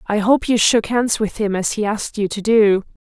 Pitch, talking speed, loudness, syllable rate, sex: 215 Hz, 260 wpm, -17 LUFS, 5.1 syllables/s, female